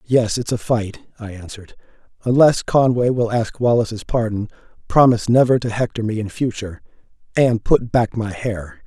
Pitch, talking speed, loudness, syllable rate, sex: 115 Hz, 155 wpm, -18 LUFS, 5.2 syllables/s, male